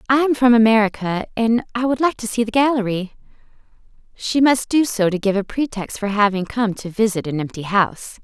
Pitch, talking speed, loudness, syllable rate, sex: 220 Hz, 205 wpm, -19 LUFS, 5.6 syllables/s, female